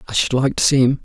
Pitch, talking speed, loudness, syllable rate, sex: 135 Hz, 345 wpm, -17 LUFS, 6.9 syllables/s, male